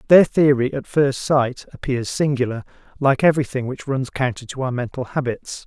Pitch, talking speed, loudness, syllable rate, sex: 130 Hz, 170 wpm, -20 LUFS, 5.2 syllables/s, male